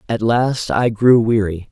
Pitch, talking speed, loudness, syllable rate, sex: 115 Hz, 175 wpm, -16 LUFS, 3.9 syllables/s, male